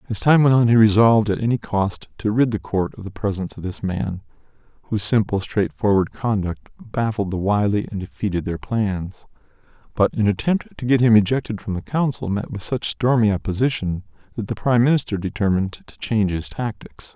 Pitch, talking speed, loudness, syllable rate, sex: 105 Hz, 190 wpm, -21 LUFS, 5.5 syllables/s, male